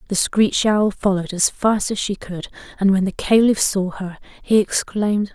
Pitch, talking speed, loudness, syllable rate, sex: 200 Hz, 190 wpm, -19 LUFS, 4.8 syllables/s, female